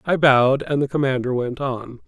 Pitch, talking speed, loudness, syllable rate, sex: 135 Hz, 205 wpm, -20 LUFS, 5.2 syllables/s, male